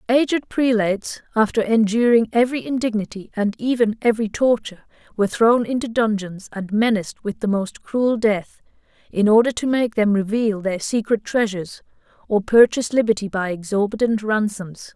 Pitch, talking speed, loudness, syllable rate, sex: 220 Hz, 145 wpm, -20 LUFS, 5.3 syllables/s, female